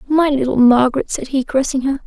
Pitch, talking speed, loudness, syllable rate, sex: 270 Hz, 205 wpm, -16 LUFS, 6.8 syllables/s, female